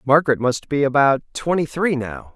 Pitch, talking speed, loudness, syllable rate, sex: 140 Hz, 180 wpm, -19 LUFS, 5.1 syllables/s, male